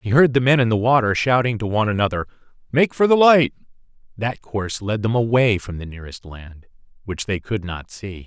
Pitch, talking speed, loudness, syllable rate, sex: 115 Hz, 210 wpm, -19 LUFS, 5.6 syllables/s, male